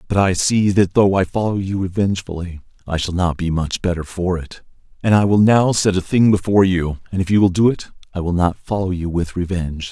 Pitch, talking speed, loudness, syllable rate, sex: 95 Hz, 235 wpm, -18 LUFS, 5.8 syllables/s, male